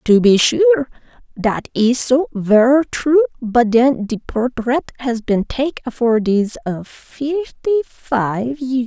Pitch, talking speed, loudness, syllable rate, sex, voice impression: 250 Hz, 120 wpm, -17 LUFS, 3.5 syllables/s, female, very feminine, very adult-like, thin, tensed, powerful, bright, hard, very soft, slightly cute, cool, very refreshing, sincere, very calm, very friendly, very reassuring, unique, very elegant, very wild, lively, very kind